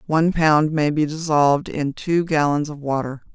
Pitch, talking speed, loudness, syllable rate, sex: 150 Hz, 180 wpm, -20 LUFS, 4.8 syllables/s, female